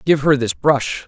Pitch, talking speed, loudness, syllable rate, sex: 135 Hz, 225 wpm, -17 LUFS, 4.1 syllables/s, male